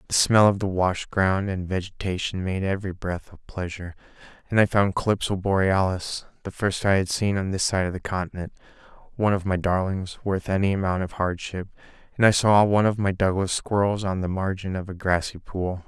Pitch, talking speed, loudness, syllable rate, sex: 95 Hz, 200 wpm, -24 LUFS, 5.5 syllables/s, male